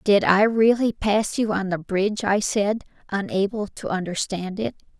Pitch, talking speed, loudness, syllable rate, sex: 200 Hz, 170 wpm, -22 LUFS, 4.5 syllables/s, female